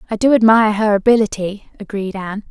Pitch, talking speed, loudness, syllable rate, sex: 210 Hz, 170 wpm, -15 LUFS, 6.4 syllables/s, female